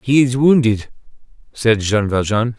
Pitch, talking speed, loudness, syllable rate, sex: 115 Hz, 140 wpm, -16 LUFS, 4.2 syllables/s, male